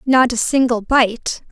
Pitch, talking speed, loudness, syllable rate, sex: 240 Hz, 160 wpm, -16 LUFS, 3.8 syllables/s, female